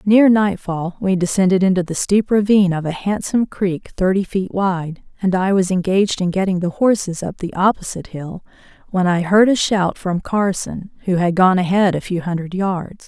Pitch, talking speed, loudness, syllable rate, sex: 190 Hz, 195 wpm, -18 LUFS, 5.1 syllables/s, female